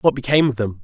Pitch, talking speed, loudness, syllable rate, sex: 125 Hz, 290 wpm, -18 LUFS, 7.6 syllables/s, male